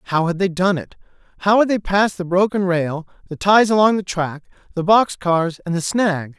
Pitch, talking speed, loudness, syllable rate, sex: 185 Hz, 215 wpm, -18 LUFS, 5.1 syllables/s, male